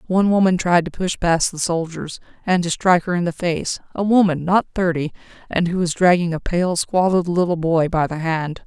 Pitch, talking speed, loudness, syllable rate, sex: 175 Hz, 200 wpm, -19 LUFS, 5.2 syllables/s, female